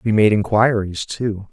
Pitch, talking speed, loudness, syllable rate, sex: 105 Hz, 160 wpm, -18 LUFS, 4.3 syllables/s, male